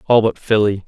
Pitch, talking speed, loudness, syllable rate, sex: 105 Hz, 205 wpm, -16 LUFS, 5.3 syllables/s, male